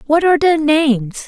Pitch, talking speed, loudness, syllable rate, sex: 290 Hz, 190 wpm, -14 LUFS, 5.3 syllables/s, female